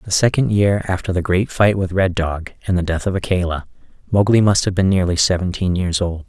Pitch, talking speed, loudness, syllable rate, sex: 95 Hz, 220 wpm, -18 LUFS, 5.5 syllables/s, male